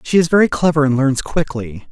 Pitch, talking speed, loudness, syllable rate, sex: 145 Hz, 220 wpm, -16 LUFS, 5.5 syllables/s, male